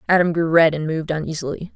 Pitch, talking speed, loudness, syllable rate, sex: 160 Hz, 205 wpm, -19 LUFS, 7.0 syllables/s, female